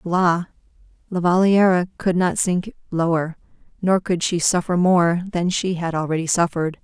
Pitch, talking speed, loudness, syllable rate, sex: 175 Hz, 140 wpm, -20 LUFS, 4.5 syllables/s, female